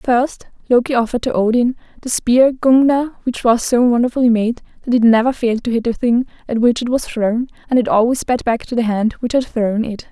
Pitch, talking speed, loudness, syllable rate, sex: 240 Hz, 225 wpm, -16 LUFS, 5.6 syllables/s, female